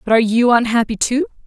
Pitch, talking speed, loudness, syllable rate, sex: 230 Hz, 205 wpm, -16 LUFS, 6.6 syllables/s, female